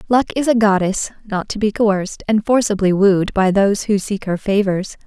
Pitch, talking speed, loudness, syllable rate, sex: 205 Hz, 200 wpm, -17 LUFS, 5.1 syllables/s, female